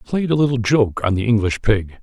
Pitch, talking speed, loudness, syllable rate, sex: 115 Hz, 235 wpm, -18 LUFS, 5.5 syllables/s, male